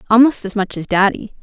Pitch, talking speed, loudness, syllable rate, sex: 210 Hz, 210 wpm, -16 LUFS, 6.0 syllables/s, female